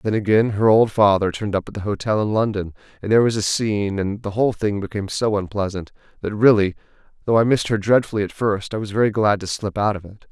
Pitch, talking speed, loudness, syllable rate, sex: 105 Hz, 235 wpm, -20 LUFS, 6.6 syllables/s, male